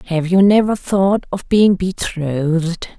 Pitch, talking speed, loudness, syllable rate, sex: 180 Hz, 140 wpm, -16 LUFS, 3.6 syllables/s, female